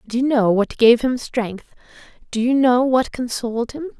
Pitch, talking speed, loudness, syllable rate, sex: 245 Hz, 180 wpm, -18 LUFS, 4.7 syllables/s, female